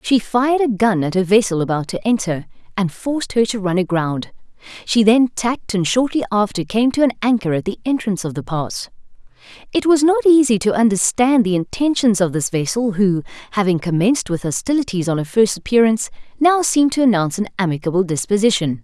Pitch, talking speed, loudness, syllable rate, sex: 210 Hz, 190 wpm, -17 LUFS, 5.9 syllables/s, female